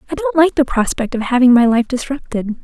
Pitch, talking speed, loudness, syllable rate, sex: 265 Hz, 230 wpm, -15 LUFS, 5.9 syllables/s, female